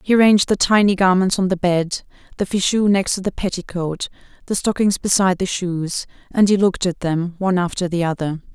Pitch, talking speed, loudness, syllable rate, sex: 185 Hz, 195 wpm, -19 LUFS, 5.7 syllables/s, female